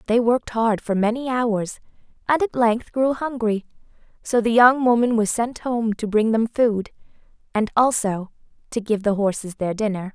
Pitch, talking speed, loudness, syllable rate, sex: 225 Hz, 175 wpm, -21 LUFS, 4.7 syllables/s, female